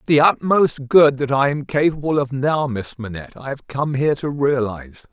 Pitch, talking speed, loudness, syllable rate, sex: 135 Hz, 200 wpm, -18 LUFS, 5.2 syllables/s, male